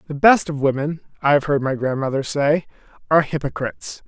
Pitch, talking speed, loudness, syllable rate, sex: 145 Hz, 175 wpm, -20 LUFS, 4.3 syllables/s, male